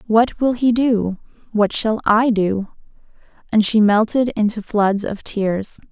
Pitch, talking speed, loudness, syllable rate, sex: 215 Hz, 150 wpm, -18 LUFS, 3.8 syllables/s, female